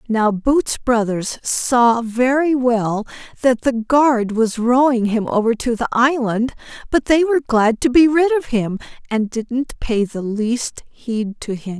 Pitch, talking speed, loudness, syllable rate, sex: 240 Hz, 170 wpm, -18 LUFS, 3.7 syllables/s, female